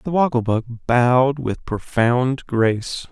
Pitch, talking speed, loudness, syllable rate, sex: 125 Hz, 135 wpm, -19 LUFS, 3.9 syllables/s, male